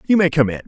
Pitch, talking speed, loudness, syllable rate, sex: 155 Hz, 360 wpm, -17 LUFS, 8.2 syllables/s, male